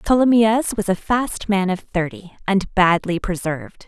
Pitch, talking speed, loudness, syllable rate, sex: 195 Hz, 155 wpm, -19 LUFS, 4.3 syllables/s, female